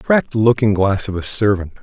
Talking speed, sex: 165 wpm, male